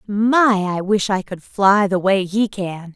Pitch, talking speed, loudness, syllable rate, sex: 200 Hz, 205 wpm, -17 LUFS, 3.6 syllables/s, female